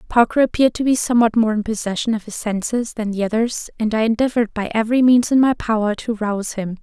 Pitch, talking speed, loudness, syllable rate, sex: 225 Hz, 230 wpm, -18 LUFS, 6.5 syllables/s, female